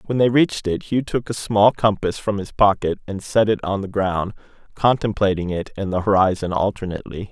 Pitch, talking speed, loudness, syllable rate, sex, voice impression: 100 Hz, 195 wpm, -20 LUFS, 5.5 syllables/s, male, masculine, middle-aged, slightly tensed, powerful, bright, muffled, slightly raspy, intellectual, mature, friendly, wild, slightly strict, slightly modest